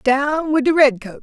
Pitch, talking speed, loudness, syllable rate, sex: 280 Hz, 195 wpm, -16 LUFS, 4.4 syllables/s, female